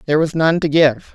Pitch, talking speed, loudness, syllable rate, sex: 155 Hz, 260 wpm, -15 LUFS, 5.8 syllables/s, female